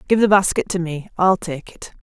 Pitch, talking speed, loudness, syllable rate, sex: 180 Hz, 205 wpm, -18 LUFS, 5.3 syllables/s, female